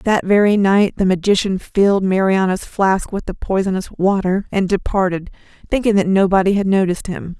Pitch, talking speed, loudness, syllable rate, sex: 190 Hz, 160 wpm, -17 LUFS, 5.3 syllables/s, female